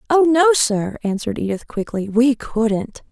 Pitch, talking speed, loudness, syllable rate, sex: 240 Hz, 155 wpm, -18 LUFS, 4.3 syllables/s, female